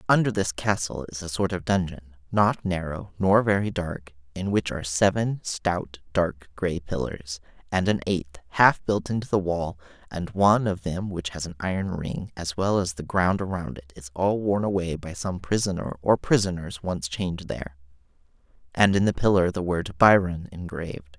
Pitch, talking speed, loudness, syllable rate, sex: 90 Hz, 185 wpm, -25 LUFS, 4.8 syllables/s, male